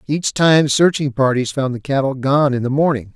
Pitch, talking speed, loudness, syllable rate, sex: 140 Hz, 210 wpm, -16 LUFS, 5.0 syllables/s, male